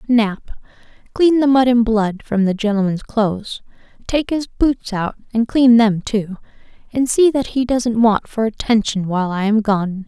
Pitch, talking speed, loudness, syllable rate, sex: 225 Hz, 180 wpm, -17 LUFS, 4.4 syllables/s, female